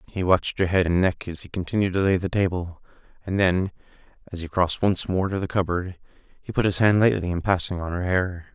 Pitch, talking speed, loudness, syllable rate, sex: 90 Hz, 230 wpm, -23 LUFS, 6.0 syllables/s, male